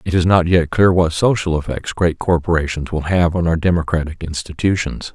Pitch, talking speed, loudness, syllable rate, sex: 85 Hz, 185 wpm, -17 LUFS, 5.4 syllables/s, male